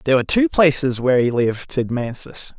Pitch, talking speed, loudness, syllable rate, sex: 135 Hz, 210 wpm, -18 LUFS, 6.1 syllables/s, male